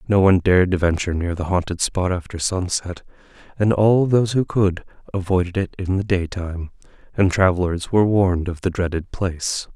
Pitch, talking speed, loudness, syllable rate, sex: 95 Hz, 180 wpm, -20 LUFS, 5.7 syllables/s, male